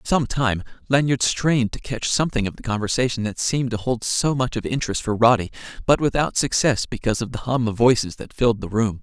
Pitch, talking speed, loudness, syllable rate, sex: 120 Hz, 225 wpm, -21 LUFS, 6.1 syllables/s, male